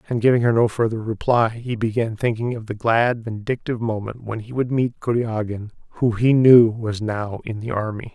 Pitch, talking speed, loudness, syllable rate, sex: 115 Hz, 200 wpm, -21 LUFS, 5.2 syllables/s, male